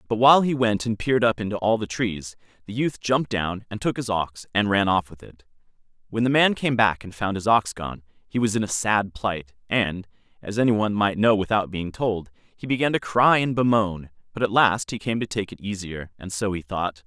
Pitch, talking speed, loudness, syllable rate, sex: 105 Hz, 240 wpm, -23 LUFS, 5.3 syllables/s, male